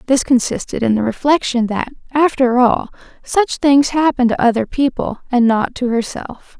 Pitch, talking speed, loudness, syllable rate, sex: 255 Hz, 165 wpm, -16 LUFS, 4.9 syllables/s, female